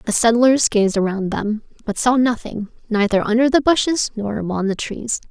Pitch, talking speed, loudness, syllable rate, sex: 225 Hz, 180 wpm, -18 LUFS, 4.8 syllables/s, female